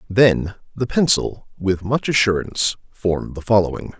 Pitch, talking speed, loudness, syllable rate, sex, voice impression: 105 Hz, 135 wpm, -19 LUFS, 4.8 syllables/s, male, very masculine, adult-like, slightly thick, cool, slightly intellectual, slightly friendly